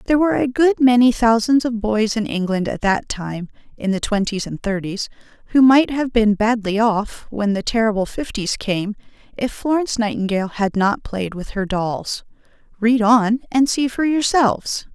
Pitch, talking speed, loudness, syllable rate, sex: 225 Hz, 175 wpm, -19 LUFS, 4.8 syllables/s, female